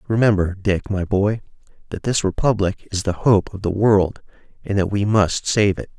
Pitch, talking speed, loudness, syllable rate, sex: 100 Hz, 190 wpm, -19 LUFS, 4.8 syllables/s, male